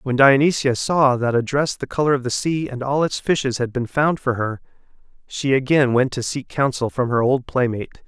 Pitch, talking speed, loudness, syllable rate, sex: 130 Hz, 225 wpm, -20 LUFS, 5.3 syllables/s, male